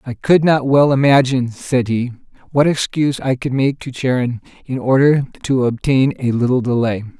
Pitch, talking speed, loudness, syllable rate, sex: 130 Hz, 175 wpm, -16 LUFS, 5.1 syllables/s, male